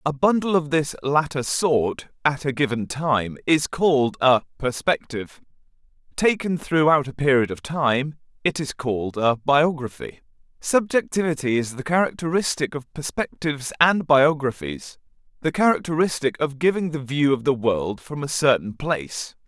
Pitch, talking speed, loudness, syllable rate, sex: 145 Hz, 140 wpm, -22 LUFS, 4.7 syllables/s, male